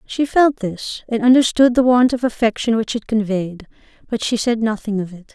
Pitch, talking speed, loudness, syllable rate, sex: 230 Hz, 200 wpm, -17 LUFS, 5.0 syllables/s, female